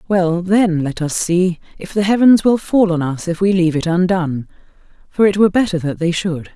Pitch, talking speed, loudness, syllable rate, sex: 180 Hz, 220 wpm, -16 LUFS, 5.4 syllables/s, female